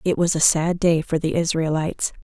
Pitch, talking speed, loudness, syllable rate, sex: 165 Hz, 215 wpm, -20 LUFS, 5.4 syllables/s, female